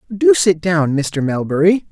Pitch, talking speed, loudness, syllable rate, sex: 165 Hz, 155 wpm, -15 LUFS, 4.1 syllables/s, male